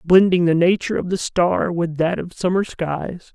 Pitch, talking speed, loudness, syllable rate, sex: 175 Hz, 195 wpm, -19 LUFS, 4.6 syllables/s, male